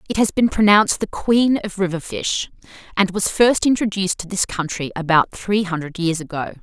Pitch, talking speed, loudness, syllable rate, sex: 190 Hz, 190 wpm, -19 LUFS, 5.3 syllables/s, female